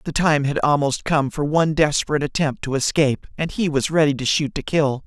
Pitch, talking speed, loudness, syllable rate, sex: 145 Hz, 225 wpm, -20 LUFS, 5.8 syllables/s, male